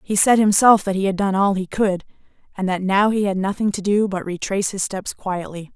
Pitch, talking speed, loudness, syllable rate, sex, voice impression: 195 Hz, 240 wpm, -19 LUFS, 5.5 syllables/s, female, very feminine, slightly middle-aged, thin, slightly tensed, slightly powerful, slightly dark, hard, very clear, fluent, slightly raspy, slightly cool, intellectual, refreshing, very sincere, slightly calm, slightly friendly, reassuring, unique, elegant, slightly wild, sweet, lively, strict, slightly intense, sharp, slightly light